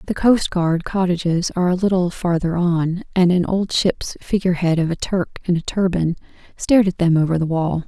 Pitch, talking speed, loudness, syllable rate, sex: 175 Hz, 190 wpm, -19 LUFS, 5.2 syllables/s, female